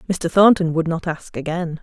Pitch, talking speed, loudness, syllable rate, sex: 170 Hz, 195 wpm, -18 LUFS, 4.9 syllables/s, female